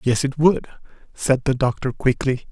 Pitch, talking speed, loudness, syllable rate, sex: 135 Hz, 165 wpm, -20 LUFS, 4.7 syllables/s, male